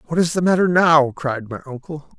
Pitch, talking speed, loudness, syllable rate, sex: 155 Hz, 220 wpm, -17 LUFS, 5.4 syllables/s, male